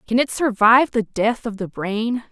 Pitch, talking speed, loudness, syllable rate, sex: 225 Hz, 205 wpm, -19 LUFS, 4.7 syllables/s, female